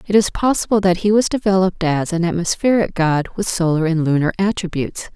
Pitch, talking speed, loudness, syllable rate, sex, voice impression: 180 Hz, 185 wpm, -18 LUFS, 5.9 syllables/s, female, very feminine, very adult-like, thin, tensed, slightly weak, slightly dark, slightly soft, very clear, very fluent, slightly raspy, slightly cute, cool, very intellectual, refreshing, very sincere, calm, very friendly, reassuring, unique, very elegant, slightly wild, sweet, slightly lively, kind, slightly modest, light